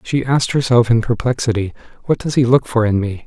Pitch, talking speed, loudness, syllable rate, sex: 120 Hz, 220 wpm, -16 LUFS, 6.0 syllables/s, male